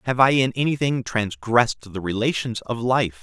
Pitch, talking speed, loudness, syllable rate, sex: 120 Hz, 165 wpm, -22 LUFS, 4.9 syllables/s, male